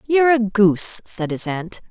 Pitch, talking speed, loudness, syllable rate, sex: 215 Hz, 190 wpm, -18 LUFS, 4.7 syllables/s, female